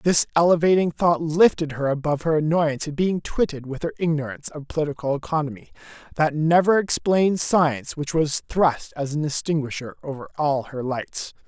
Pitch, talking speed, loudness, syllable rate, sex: 155 Hz, 160 wpm, -22 LUFS, 5.4 syllables/s, male